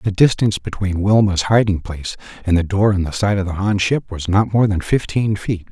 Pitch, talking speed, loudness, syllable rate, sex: 100 Hz, 230 wpm, -18 LUFS, 5.4 syllables/s, male